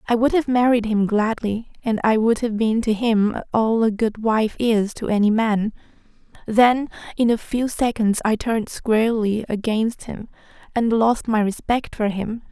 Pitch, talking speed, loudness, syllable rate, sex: 225 Hz, 175 wpm, -20 LUFS, 4.4 syllables/s, female